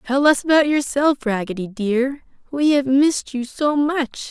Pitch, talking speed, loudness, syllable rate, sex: 270 Hz, 165 wpm, -19 LUFS, 4.5 syllables/s, female